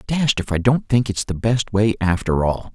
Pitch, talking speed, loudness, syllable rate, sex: 105 Hz, 240 wpm, -19 LUFS, 4.7 syllables/s, male